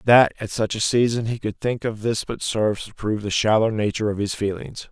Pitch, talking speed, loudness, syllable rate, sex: 110 Hz, 245 wpm, -22 LUFS, 5.8 syllables/s, male